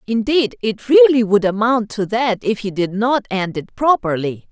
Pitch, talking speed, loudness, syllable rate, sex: 225 Hz, 185 wpm, -17 LUFS, 4.5 syllables/s, female